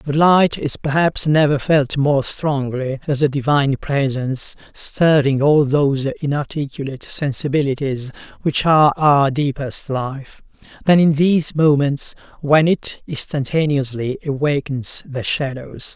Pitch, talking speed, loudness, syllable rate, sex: 140 Hz, 120 wpm, -18 LUFS, 4.3 syllables/s, male